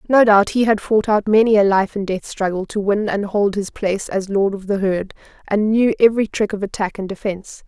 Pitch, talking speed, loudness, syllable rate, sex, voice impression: 205 Hz, 240 wpm, -18 LUFS, 5.5 syllables/s, female, feminine, slightly adult-like, slightly clear, slightly fluent, slightly sincere, friendly